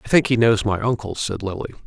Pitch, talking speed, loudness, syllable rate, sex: 110 Hz, 255 wpm, -21 LUFS, 5.5 syllables/s, male